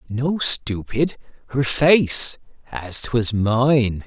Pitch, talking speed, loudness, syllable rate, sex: 125 Hz, 90 wpm, -19 LUFS, 2.5 syllables/s, male